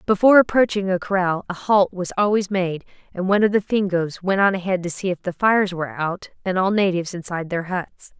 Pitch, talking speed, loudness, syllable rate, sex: 190 Hz, 220 wpm, -20 LUFS, 5.8 syllables/s, female